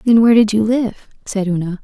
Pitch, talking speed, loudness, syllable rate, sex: 215 Hz, 230 wpm, -15 LUFS, 5.9 syllables/s, female